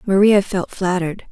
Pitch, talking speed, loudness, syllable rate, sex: 190 Hz, 135 wpm, -17 LUFS, 5.3 syllables/s, female